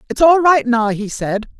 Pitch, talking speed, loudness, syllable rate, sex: 255 Hz, 225 wpm, -15 LUFS, 4.6 syllables/s, female